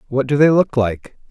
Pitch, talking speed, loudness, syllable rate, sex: 130 Hz, 230 wpm, -16 LUFS, 5.0 syllables/s, male